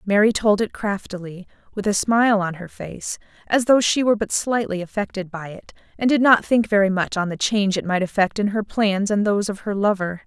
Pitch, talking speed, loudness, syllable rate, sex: 205 Hz, 230 wpm, -20 LUFS, 5.6 syllables/s, female